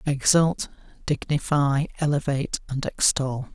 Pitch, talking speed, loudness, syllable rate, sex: 140 Hz, 85 wpm, -24 LUFS, 4.2 syllables/s, male